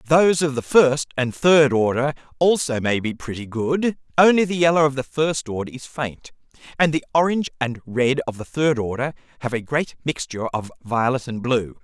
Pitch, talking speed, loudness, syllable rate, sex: 135 Hz, 195 wpm, -21 LUFS, 5.0 syllables/s, male